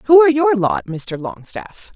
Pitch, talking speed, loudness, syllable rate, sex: 250 Hz, 185 wpm, -16 LUFS, 4.7 syllables/s, female